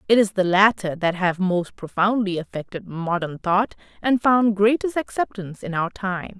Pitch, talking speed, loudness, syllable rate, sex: 195 Hz, 170 wpm, -22 LUFS, 4.7 syllables/s, female